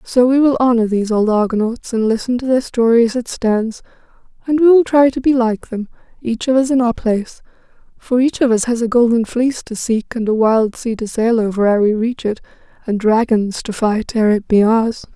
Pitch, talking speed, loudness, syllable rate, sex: 230 Hz, 230 wpm, -16 LUFS, 5.3 syllables/s, female